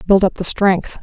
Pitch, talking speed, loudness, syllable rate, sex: 190 Hz, 235 wpm, -16 LUFS, 4.6 syllables/s, female